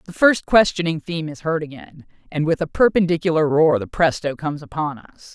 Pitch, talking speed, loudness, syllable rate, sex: 160 Hz, 190 wpm, -19 LUFS, 5.6 syllables/s, female